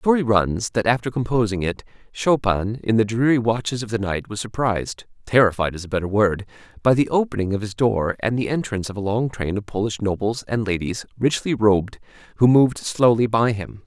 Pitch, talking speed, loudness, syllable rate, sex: 110 Hz, 195 wpm, -21 LUFS, 5.6 syllables/s, male